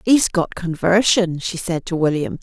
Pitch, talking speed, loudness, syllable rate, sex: 180 Hz, 175 wpm, -19 LUFS, 4.4 syllables/s, female